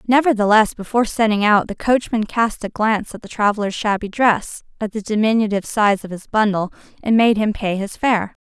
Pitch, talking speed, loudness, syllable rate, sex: 215 Hz, 190 wpm, -18 LUFS, 5.5 syllables/s, female